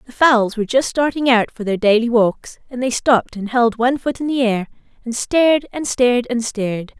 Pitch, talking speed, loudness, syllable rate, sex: 240 Hz, 225 wpm, -17 LUFS, 5.4 syllables/s, female